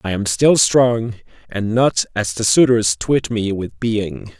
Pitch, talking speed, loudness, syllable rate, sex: 110 Hz, 180 wpm, -17 LUFS, 3.7 syllables/s, male